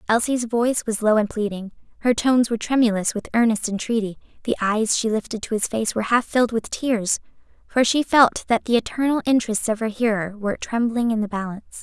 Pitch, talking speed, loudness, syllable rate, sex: 225 Hz, 205 wpm, -21 LUFS, 6.0 syllables/s, female